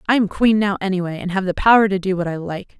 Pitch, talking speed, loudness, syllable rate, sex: 195 Hz, 300 wpm, -18 LUFS, 6.6 syllables/s, female